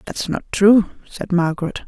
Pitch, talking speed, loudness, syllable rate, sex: 190 Hz, 160 wpm, -18 LUFS, 4.8 syllables/s, female